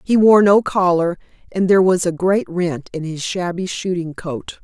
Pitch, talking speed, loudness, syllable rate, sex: 180 Hz, 195 wpm, -17 LUFS, 4.6 syllables/s, female